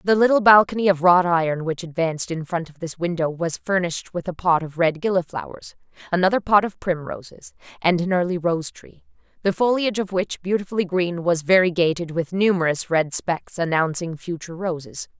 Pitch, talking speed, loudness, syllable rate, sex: 175 Hz, 180 wpm, -21 LUFS, 5.5 syllables/s, female